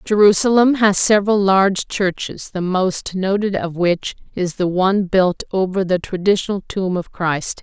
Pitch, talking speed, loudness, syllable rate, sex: 190 Hz, 155 wpm, -17 LUFS, 4.6 syllables/s, female